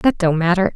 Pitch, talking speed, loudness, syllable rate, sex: 185 Hz, 235 wpm, -17 LUFS, 5.6 syllables/s, female